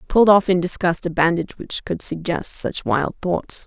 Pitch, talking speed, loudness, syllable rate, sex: 175 Hz, 215 wpm, -20 LUFS, 5.4 syllables/s, female